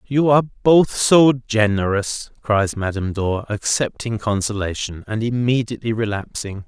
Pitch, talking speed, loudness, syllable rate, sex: 110 Hz, 115 wpm, -19 LUFS, 4.5 syllables/s, male